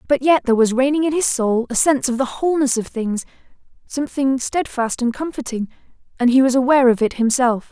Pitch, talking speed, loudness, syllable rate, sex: 260 Hz, 185 wpm, -18 LUFS, 6.1 syllables/s, female